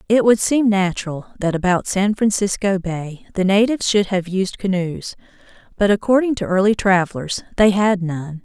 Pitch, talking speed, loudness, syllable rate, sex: 195 Hz, 165 wpm, -18 LUFS, 5.0 syllables/s, female